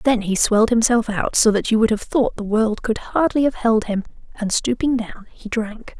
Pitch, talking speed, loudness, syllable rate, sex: 225 Hz, 230 wpm, -19 LUFS, 5.0 syllables/s, female